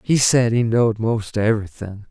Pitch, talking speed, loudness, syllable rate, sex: 110 Hz, 170 wpm, -18 LUFS, 5.0 syllables/s, male